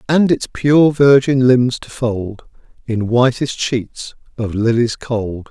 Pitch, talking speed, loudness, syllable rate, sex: 125 Hz, 140 wpm, -15 LUFS, 3.4 syllables/s, male